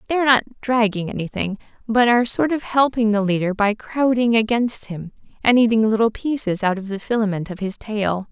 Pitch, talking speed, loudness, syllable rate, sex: 220 Hz, 195 wpm, -19 LUFS, 5.6 syllables/s, female